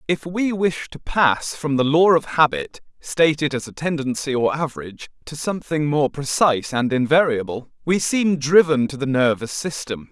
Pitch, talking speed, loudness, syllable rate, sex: 145 Hz, 170 wpm, -20 LUFS, 4.9 syllables/s, male